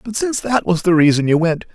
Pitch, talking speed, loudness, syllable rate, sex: 185 Hz, 275 wpm, -16 LUFS, 6.5 syllables/s, male